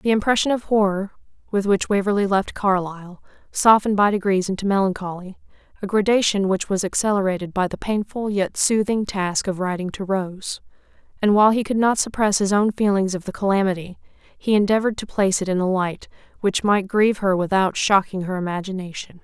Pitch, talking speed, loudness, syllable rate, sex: 195 Hz, 180 wpm, -20 LUFS, 5.7 syllables/s, female